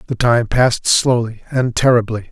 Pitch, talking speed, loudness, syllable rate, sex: 120 Hz, 155 wpm, -15 LUFS, 5.0 syllables/s, male